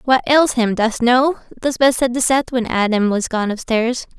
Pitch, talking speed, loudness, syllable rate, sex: 245 Hz, 200 wpm, -17 LUFS, 4.6 syllables/s, female